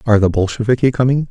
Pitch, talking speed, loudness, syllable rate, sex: 115 Hz, 185 wpm, -15 LUFS, 7.6 syllables/s, male